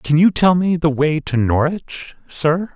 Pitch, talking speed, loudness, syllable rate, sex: 160 Hz, 195 wpm, -17 LUFS, 3.9 syllables/s, male